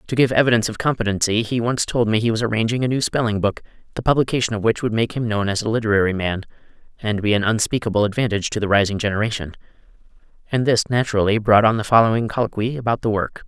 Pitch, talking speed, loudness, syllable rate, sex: 110 Hz, 215 wpm, -19 LUFS, 7.1 syllables/s, male